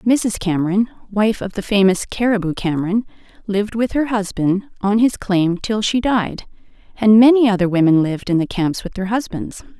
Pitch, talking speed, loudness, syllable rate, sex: 205 Hz, 180 wpm, -17 LUFS, 5.1 syllables/s, female